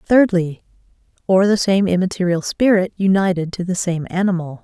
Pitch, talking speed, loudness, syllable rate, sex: 185 Hz, 140 wpm, -17 LUFS, 5.2 syllables/s, female